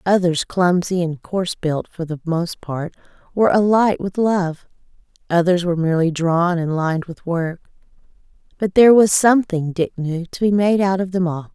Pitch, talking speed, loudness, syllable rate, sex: 180 Hz, 175 wpm, -18 LUFS, 5.1 syllables/s, female